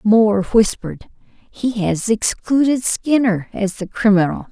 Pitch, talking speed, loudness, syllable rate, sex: 215 Hz, 120 wpm, -17 LUFS, 4.1 syllables/s, female